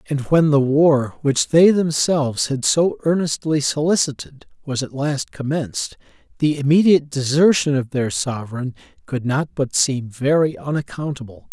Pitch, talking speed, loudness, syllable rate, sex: 145 Hz, 140 wpm, -19 LUFS, 4.7 syllables/s, male